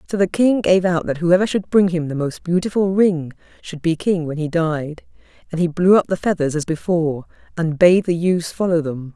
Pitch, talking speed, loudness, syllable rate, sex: 170 Hz, 225 wpm, -18 LUFS, 5.2 syllables/s, female